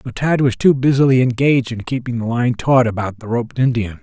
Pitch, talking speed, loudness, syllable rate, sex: 125 Hz, 225 wpm, -16 LUFS, 5.9 syllables/s, male